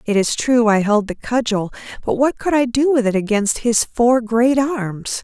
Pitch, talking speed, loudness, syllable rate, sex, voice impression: 235 Hz, 220 wpm, -17 LUFS, 4.4 syllables/s, female, very feminine, slightly adult-like, thin, tensed, slightly powerful, bright, soft, clear, fluent, cute, slightly cool, intellectual, very refreshing, sincere, calm, very friendly, very reassuring, unique, very elegant, slightly wild, very sweet, lively, very kind, modest, slightly light